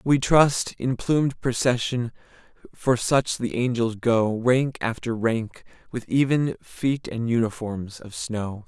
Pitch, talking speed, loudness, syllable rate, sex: 120 Hz, 140 wpm, -24 LUFS, 3.7 syllables/s, male